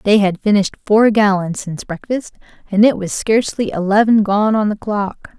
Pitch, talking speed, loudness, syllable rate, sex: 205 Hz, 180 wpm, -16 LUFS, 5.3 syllables/s, female